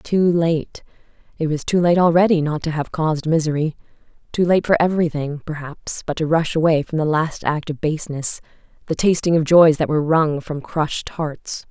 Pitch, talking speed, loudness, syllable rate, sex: 160 Hz, 185 wpm, -19 LUFS, 5.2 syllables/s, female